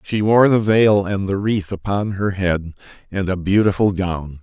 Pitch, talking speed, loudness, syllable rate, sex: 100 Hz, 190 wpm, -18 LUFS, 4.4 syllables/s, male